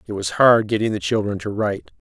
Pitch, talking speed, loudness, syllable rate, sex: 105 Hz, 230 wpm, -19 LUFS, 6.0 syllables/s, male